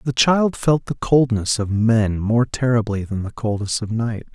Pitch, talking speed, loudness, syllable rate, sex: 115 Hz, 195 wpm, -19 LUFS, 4.4 syllables/s, male